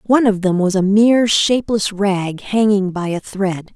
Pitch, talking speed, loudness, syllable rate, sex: 200 Hz, 190 wpm, -16 LUFS, 4.7 syllables/s, female